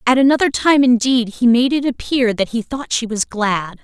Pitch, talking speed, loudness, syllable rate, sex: 245 Hz, 220 wpm, -16 LUFS, 4.9 syllables/s, female